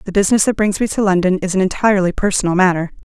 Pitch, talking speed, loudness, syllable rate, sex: 190 Hz, 235 wpm, -15 LUFS, 7.6 syllables/s, female